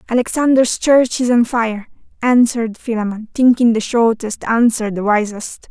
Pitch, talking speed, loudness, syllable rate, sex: 230 Hz, 135 wpm, -15 LUFS, 4.7 syllables/s, female